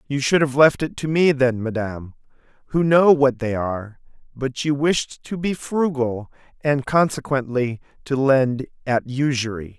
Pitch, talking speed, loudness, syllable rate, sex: 135 Hz, 160 wpm, -20 LUFS, 4.4 syllables/s, male